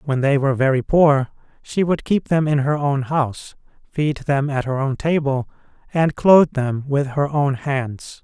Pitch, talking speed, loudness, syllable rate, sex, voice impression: 140 Hz, 190 wpm, -19 LUFS, 4.4 syllables/s, male, masculine, adult-like, slightly weak, soft, clear, fluent, calm, friendly, reassuring, slightly lively, modest